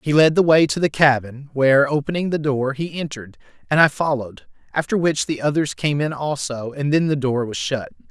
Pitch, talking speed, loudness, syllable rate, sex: 145 Hz, 215 wpm, -19 LUFS, 5.5 syllables/s, male